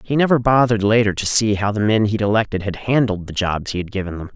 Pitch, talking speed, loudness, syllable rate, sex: 105 Hz, 260 wpm, -18 LUFS, 6.4 syllables/s, male